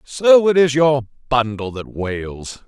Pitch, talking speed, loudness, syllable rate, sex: 125 Hz, 155 wpm, -17 LUFS, 3.6 syllables/s, male